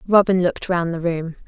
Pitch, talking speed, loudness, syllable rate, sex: 175 Hz, 205 wpm, -20 LUFS, 5.5 syllables/s, female